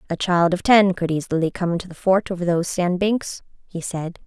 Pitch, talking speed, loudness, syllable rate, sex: 180 Hz, 225 wpm, -20 LUFS, 5.5 syllables/s, female